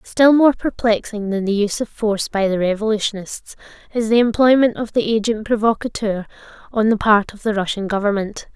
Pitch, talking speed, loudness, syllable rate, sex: 215 Hz, 175 wpm, -18 LUFS, 5.5 syllables/s, female